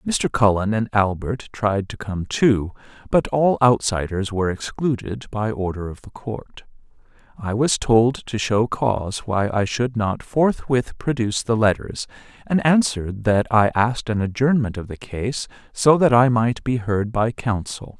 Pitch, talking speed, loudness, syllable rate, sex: 115 Hz, 165 wpm, -21 LUFS, 4.4 syllables/s, male